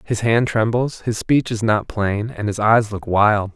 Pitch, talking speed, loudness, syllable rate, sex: 110 Hz, 220 wpm, -19 LUFS, 4.1 syllables/s, male